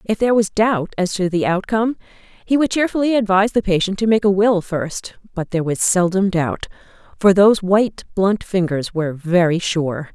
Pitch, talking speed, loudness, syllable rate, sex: 190 Hz, 190 wpm, -18 LUFS, 5.4 syllables/s, female